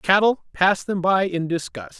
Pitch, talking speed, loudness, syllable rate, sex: 175 Hz, 180 wpm, -21 LUFS, 4.3 syllables/s, male